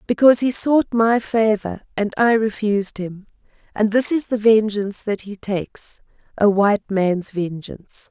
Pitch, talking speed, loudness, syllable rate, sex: 210 Hz, 150 wpm, -19 LUFS, 4.6 syllables/s, female